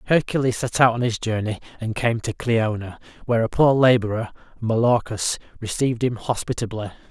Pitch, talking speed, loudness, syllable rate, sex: 115 Hz, 150 wpm, -22 LUFS, 5.6 syllables/s, male